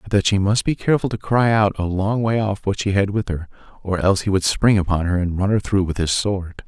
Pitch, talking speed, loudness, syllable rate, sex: 100 Hz, 290 wpm, -19 LUFS, 5.7 syllables/s, male